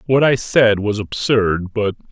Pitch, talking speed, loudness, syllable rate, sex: 110 Hz, 170 wpm, -17 LUFS, 3.8 syllables/s, male